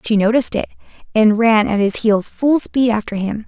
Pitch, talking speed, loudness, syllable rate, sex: 220 Hz, 205 wpm, -16 LUFS, 5.2 syllables/s, female